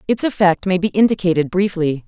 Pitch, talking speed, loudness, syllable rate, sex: 185 Hz, 175 wpm, -17 LUFS, 5.8 syllables/s, female